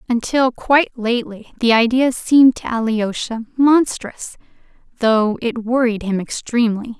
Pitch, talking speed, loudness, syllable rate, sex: 235 Hz, 120 wpm, -17 LUFS, 4.6 syllables/s, female